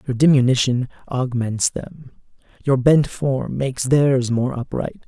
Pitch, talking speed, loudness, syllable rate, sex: 130 Hz, 130 wpm, -19 LUFS, 4.0 syllables/s, male